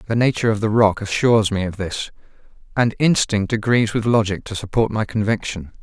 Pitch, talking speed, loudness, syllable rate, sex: 105 Hz, 185 wpm, -19 LUFS, 5.7 syllables/s, male